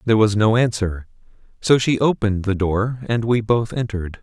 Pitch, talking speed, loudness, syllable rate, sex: 110 Hz, 185 wpm, -19 LUFS, 5.5 syllables/s, male